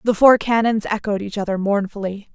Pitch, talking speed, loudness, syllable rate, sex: 210 Hz, 180 wpm, -19 LUFS, 5.5 syllables/s, female